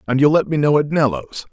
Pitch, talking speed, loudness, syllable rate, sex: 140 Hz, 275 wpm, -16 LUFS, 6.0 syllables/s, male